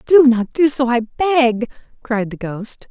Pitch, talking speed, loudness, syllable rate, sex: 250 Hz, 185 wpm, -17 LUFS, 3.7 syllables/s, female